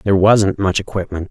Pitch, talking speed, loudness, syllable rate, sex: 95 Hz, 185 wpm, -16 LUFS, 5.5 syllables/s, male